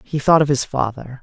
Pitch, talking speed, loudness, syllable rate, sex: 135 Hz, 245 wpm, -18 LUFS, 5.3 syllables/s, male